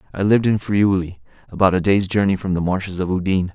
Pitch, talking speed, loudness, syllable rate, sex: 95 Hz, 220 wpm, -19 LUFS, 6.7 syllables/s, male